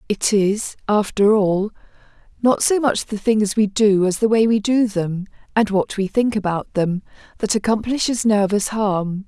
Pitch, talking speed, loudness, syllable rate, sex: 210 Hz, 175 wpm, -19 LUFS, 4.4 syllables/s, female